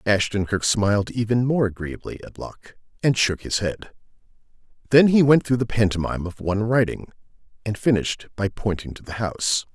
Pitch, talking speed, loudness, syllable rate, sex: 110 Hz, 170 wpm, -22 LUFS, 5.6 syllables/s, male